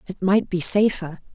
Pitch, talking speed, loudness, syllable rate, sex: 185 Hz, 180 wpm, -19 LUFS, 4.6 syllables/s, female